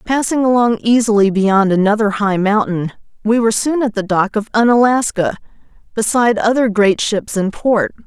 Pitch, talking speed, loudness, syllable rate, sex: 215 Hz, 155 wpm, -15 LUFS, 5.1 syllables/s, female